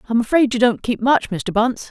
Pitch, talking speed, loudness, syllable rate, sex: 235 Hz, 250 wpm, -18 LUFS, 5.8 syllables/s, female